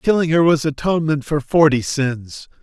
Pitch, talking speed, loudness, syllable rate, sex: 150 Hz, 160 wpm, -17 LUFS, 4.8 syllables/s, male